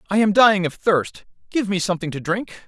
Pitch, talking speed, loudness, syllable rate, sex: 190 Hz, 225 wpm, -20 LUFS, 6.3 syllables/s, male